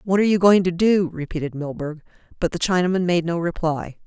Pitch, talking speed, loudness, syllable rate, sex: 175 Hz, 205 wpm, -21 LUFS, 5.9 syllables/s, female